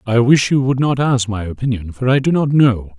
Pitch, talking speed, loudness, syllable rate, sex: 125 Hz, 260 wpm, -16 LUFS, 5.3 syllables/s, male